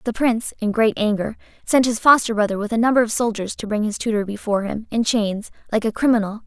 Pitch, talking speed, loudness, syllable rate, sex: 220 Hz, 230 wpm, -20 LUFS, 6.3 syllables/s, female